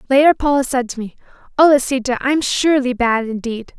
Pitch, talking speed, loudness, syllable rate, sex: 260 Hz, 175 wpm, -16 LUFS, 5.8 syllables/s, female